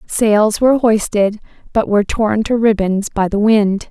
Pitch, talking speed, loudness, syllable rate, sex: 215 Hz, 170 wpm, -15 LUFS, 4.3 syllables/s, female